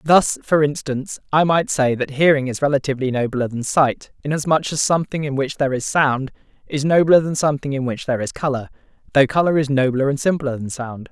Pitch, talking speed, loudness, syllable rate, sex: 140 Hz, 205 wpm, -19 LUFS, 6.0 syllables/s, male